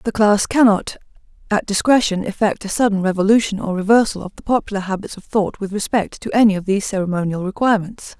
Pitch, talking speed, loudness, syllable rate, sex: 205 Hz, 185 wpm, -18 LUFS, 6.3 syllables/s, female